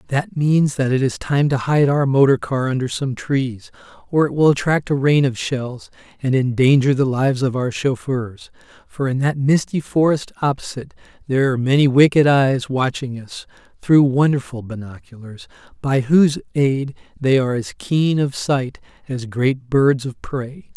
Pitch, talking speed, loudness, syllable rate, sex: 135 Hz, 170 wpm, -18 LUFS, 4.7 syllables/s, male